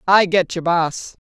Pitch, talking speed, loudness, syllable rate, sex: 175 Hz, 190 wpm, -18 LUFS, 3.9 syllables/s, female